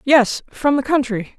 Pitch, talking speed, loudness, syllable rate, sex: 260 Hz, 130 wpm, -18 LUFS, 4.1 syllables/s, female